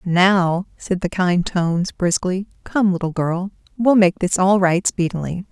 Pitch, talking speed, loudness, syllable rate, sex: 185 Hz, 165 wpm, -19 LUFS, 4.1 syllables/s, female